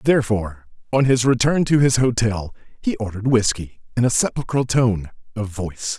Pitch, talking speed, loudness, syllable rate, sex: 115 Hz, 160 wpm, -20 LUFS, 5.5 syllables/s, male